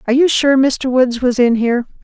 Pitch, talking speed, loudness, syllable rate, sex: 255 Hz, 235 wpm, -14 LUFS, 5.7 syllables/s, female